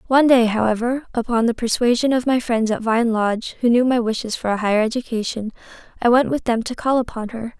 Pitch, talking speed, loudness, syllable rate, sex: 235 Hz, 220 wpm, -19 LUFS, 6.1 syllables/s, female